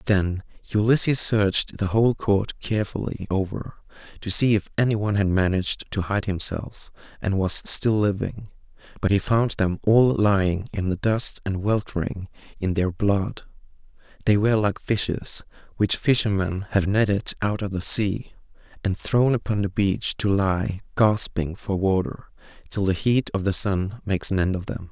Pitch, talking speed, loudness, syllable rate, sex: 100 Hz, 165 wpm, -23 LUFS, 4.6 syllables/s, male